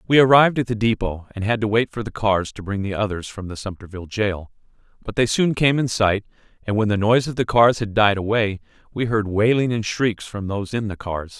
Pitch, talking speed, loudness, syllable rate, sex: 110 Hz, 240 wpm, -20 LUFS, 5.7 syllables/s, male